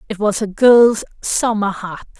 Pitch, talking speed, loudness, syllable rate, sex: 210 Hz, 165 wpm, -15 LUFS, 4.0 syllables/s, female